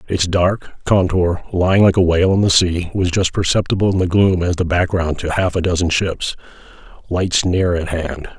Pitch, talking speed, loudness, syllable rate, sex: 90 Hz, 200 wpm, -17 LUFS, 5.2 syllables/s, male